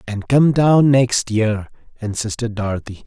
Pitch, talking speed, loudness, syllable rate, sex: 115 Hz, 135 wpm, -17 LUFS, 4.3 syllables/s, male